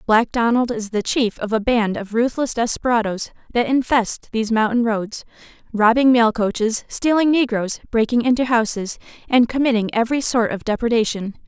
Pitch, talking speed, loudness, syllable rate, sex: 230 Hz, 155 wpm, -19 LUFS, 5.1 syllables/s, female